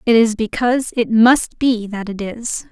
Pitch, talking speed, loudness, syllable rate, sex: 230 Hz, 200 wpm, -17 LUFS, 4.3 syllables/s, female